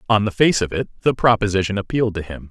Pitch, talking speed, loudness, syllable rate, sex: 105 Hz, 240 wpm, -19 LUFS, 6.9 syllables/s, male